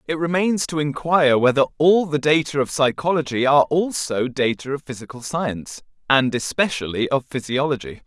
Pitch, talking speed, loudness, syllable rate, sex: 140 Hz, 150 wpm, -20 LUFS, 5.3 syllables/s, male